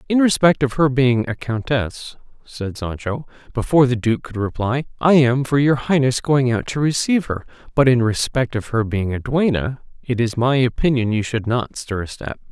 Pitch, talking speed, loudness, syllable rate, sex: 125 Hz, 200 wpm, -19 LUFS, 5.0 syllables/s, male